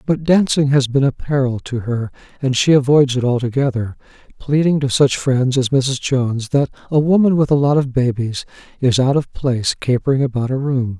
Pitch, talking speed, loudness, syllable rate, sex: 135 Hz, 195 wpm, -17 LUFS, 5.2 syllables/s, male